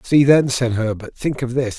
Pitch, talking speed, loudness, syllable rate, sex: 125 Hz, 235 wpm, -18 LUFS, 4.7 syllables/s, male